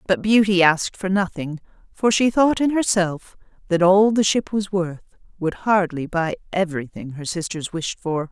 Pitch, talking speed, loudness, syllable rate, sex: 185 Hz, 175 wpm, -20 LUFS, 4.7 syllables/s, female